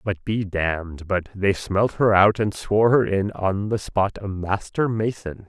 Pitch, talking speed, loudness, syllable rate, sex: 100 Hz, 195 wpm, -22 LUFS, 4.2 syllables/s, male